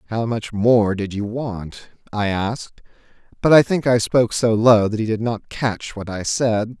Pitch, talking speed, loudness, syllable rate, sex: 110 Hz, 205 wpm, -19 LUFS, 4.3 syllables/s, male